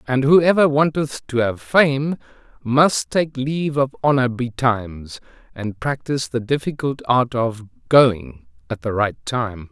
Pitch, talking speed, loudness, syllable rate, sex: 125 Hz, 135 wpm, -19 LUFS, 4.0 syllables/s, male